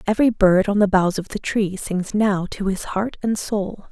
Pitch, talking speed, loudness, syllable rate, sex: 200 Hz, 230 wpm, -20 LUFS, 4.6 syllables/s, female